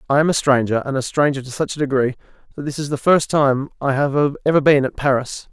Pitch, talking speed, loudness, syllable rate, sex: 140 Hz, 250 wpm, -18 LUFS, 5.9 syllables/s, male